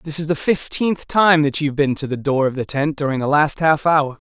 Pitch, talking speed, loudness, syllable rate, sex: 150 Hz, 280 wpm, -18 LUFS, 5.3 syllables/s, male